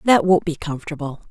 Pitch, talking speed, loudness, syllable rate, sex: 165 Hz, 185 wpm, -20 LUFS, 5.9 syllables/s, female